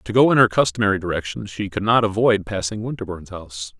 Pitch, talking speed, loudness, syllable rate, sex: 105 Hz, 205 wpm, -20 LUFS, 6.5 syllables/s, male